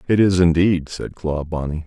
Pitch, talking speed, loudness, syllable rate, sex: 85 Hz, 160 wpm, -19 LUFS, 4.8 syllables/s, male